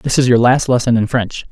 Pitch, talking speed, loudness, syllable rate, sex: 120 Hz, 275 wpm, -14 LUFS, 5.6 syllables/s, male